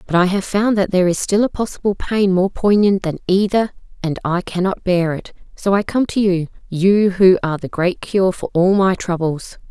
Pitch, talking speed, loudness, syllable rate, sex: 190 Hz, 210 wpm, -17 LUFS, 5.0 syllables/s, female